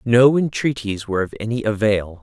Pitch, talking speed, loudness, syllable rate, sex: 115 Hz, 160 wpm, -19 LUFS, 5.3 syllables/s, male